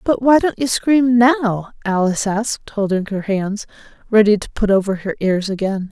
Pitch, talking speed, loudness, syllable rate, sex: 215 Hz, 180 wpm, -17 LUFS, 4.8 syllables/s, female